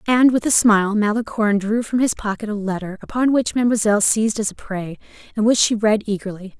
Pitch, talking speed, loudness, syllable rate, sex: 215 Hz, 210 wpm, -19 LUFS, 6.2 syllables/s, female